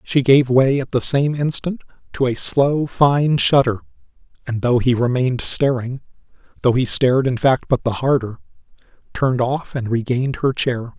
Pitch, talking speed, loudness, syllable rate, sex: 130 Hz, 160 wpm, -18 LUFS, 4.8 syllables/s, male